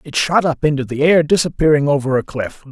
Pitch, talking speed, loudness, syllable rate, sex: 145 Hz, 220 wpm, -16 LUFS, 5.8 syllables/s, male